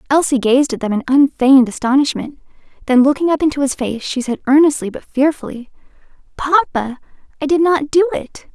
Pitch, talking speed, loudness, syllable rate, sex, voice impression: 275 Hz, 170 wpm, -15 LUFS, 5.7 syllables/s, female, feminine, slightly adult-like, slightly soft, cute, slightly calm, friendly, slightly kind